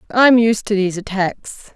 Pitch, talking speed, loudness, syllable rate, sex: 210 Hz, 170 wpm, -16 LUFS, 5.0 syllables/s, female